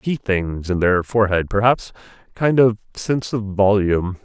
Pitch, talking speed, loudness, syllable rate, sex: 105 Hz, 155 wpm, -19 LUFS, 4.9 syllables/s, male